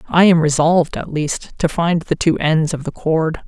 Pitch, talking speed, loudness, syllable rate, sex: 160 Hz, 225 wpm, -17 LUFS, 4.8 syllables/s, female